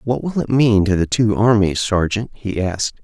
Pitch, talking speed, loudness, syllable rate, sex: 105 Hz, 220 wpm, -17 LUFS, 4.9 syllables/s, male